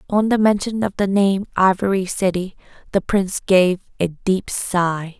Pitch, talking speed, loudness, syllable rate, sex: 190 Hz, 160 wpm, -19 LUFS, 4.3 syllables/s, female